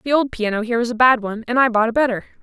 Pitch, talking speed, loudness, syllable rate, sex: 235 Hz, 320 wpm, -18 LUFS, 7.9 syllables/s, female